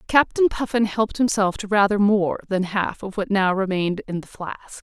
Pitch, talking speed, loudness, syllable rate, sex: 205 Hz, 200 wpm, -21 LUFS, 5.1 syllables/s, female